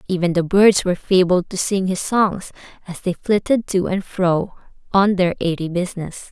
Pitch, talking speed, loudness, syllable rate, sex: 185 Hz, 180 wpm, -19 LUFS, 4.9 syllables/s, female